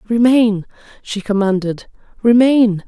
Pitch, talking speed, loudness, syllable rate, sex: 215 Hz, 85 wpm, -15 LUFS, 4.0 syllables/s, female